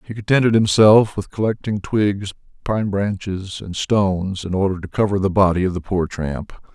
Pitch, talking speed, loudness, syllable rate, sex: 100 Hz, 180 wpm, -19 LUFS, 4.9 syllables/s, male